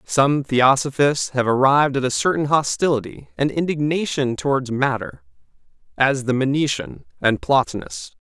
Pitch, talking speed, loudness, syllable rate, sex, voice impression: 130 Hz, 125 wpm, -19 LUFS, 4.8 syllables/s, male, very masculine, very adult-like, slightly tensed, powerful, bright, slightly soft, clear, fluent, very cool, intellectual, very refreshing, very sincere, calm, slightly mature, very friendly, very reassuring, unique, very elegant, wild, sweet, very lively, kind, slightly intense